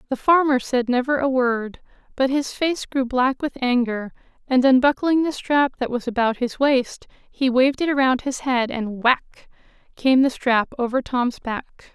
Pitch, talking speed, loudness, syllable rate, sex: 255 Hz, 180 wpm, -21 LUFS, 4.6 syllables/s, female